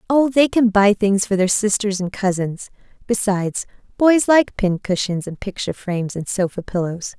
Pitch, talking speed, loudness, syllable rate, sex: 205 Hz, 165 wpm, -19 LUFS, 4.9 syllables/s, female